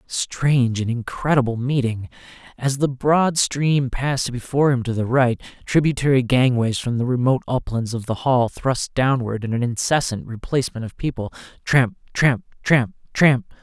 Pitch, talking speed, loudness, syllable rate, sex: 125 Hz, 155 wpm, -20 LUFS, 4.8 syllables/s, male